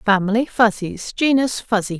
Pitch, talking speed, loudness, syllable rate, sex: 215 Hz, 120 wpm, -19 LUFS, 4.6 syllables/s, female